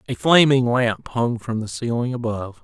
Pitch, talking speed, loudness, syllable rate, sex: 120 Hz, 180 wpm, -20 LUFS, 4.9 syllables/s, male